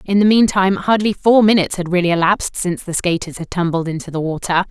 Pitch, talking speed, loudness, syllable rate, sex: 185 Hz, 215 wpm, -16 LUFS, 6.6 syllables/s, female